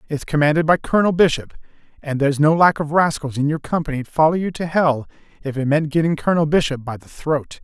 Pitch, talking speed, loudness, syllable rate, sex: 150 Hz, 210 wpm, -19 LUFS, 6.2 syllables/s, male